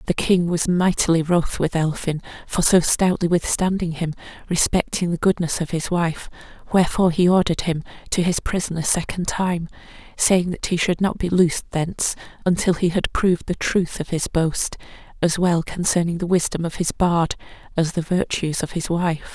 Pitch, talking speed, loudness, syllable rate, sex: 170 Hz, 185 wpm, -21 LUFS, 5.1 syllables/s, female